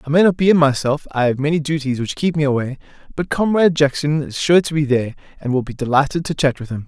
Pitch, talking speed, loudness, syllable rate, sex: 145 Hz, 245 wpm, -18 LUFS, 6.5 syllables/s, male